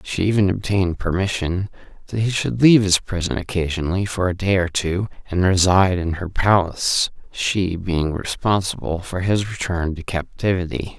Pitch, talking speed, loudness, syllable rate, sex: 90 Hz, 160 wpm, -20 LUFS, 5.0 syllables/s, male